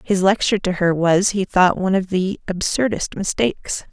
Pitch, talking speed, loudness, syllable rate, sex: 190 Hz, 185 wpm, -19 LUFS, 5.2 syllables/s, female